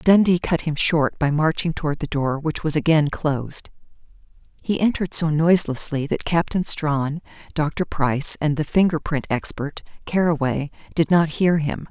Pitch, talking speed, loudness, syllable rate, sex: 155 Hz, 155 wpm, -21 LUFS, 4.7 syllables/s, female